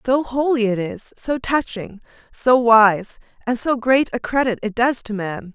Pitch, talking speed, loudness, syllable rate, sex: 235 Hz, 185 wpm, -19 LUFS, 4.3 syllables/s, female